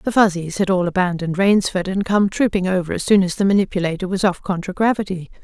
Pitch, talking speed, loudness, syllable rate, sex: 190 Hz, 200 wpm, -19 LUFS, 6.3 syllables/s, female